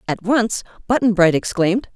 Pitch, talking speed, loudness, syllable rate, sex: 205 Hz, 155 wpm, -18 LUFS, 5.2 syllables/s, female